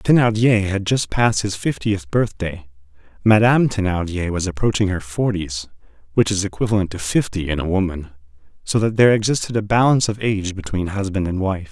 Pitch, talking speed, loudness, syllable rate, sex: 100 Hz, 170 wpm, -19 LUFS, 5.7 syllables/s, male